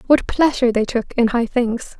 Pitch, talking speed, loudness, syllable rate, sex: 240 Hz, 210 wpm, -18 LUFS, 5.0 syllables/s, female